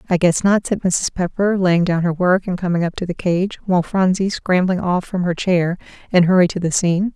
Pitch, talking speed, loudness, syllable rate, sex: 180 Hz, 235 wpm, -18 LUFS, 5.4 syllables/s, female